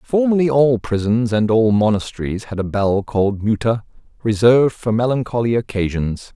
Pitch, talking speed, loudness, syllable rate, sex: 115 Hz, 140 wpm, -18 LUFS, 5.1 syllables/s, male